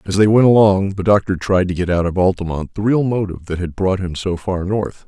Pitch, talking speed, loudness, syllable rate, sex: 95 Hz, 260 wpm, -17 LUFS, 5.7 syllables/s, male